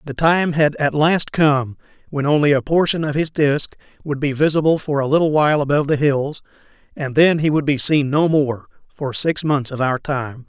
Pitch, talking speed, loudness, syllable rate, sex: 145 Hz, 210 wpm, -18 LUFS, 5.0 syllables/s, male